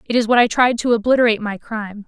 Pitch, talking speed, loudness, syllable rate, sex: 225 Hz, 260 wpm, -17 LUFS, 7.2 syllables/s, female